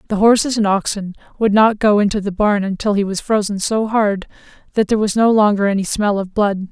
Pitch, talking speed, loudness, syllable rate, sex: 205 Hz, 225 wpm, -16 LUFS, 5.7 syllables/s, female